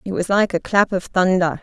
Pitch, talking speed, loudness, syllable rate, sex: 185 Hz, 260 wpm, -18 LUFS, 5.2 syllables/s, female